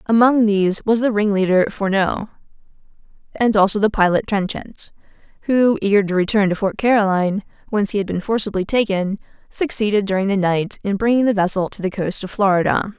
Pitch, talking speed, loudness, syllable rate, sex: 205 Hz, 170 wpm, -18 LUFS, 5.8 syllables/s, female